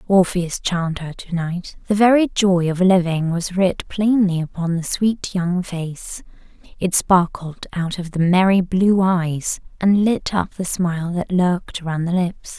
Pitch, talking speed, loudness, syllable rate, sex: 180 Hz, 170 wpm, -19 LUFS, 4.1 syllables/s, female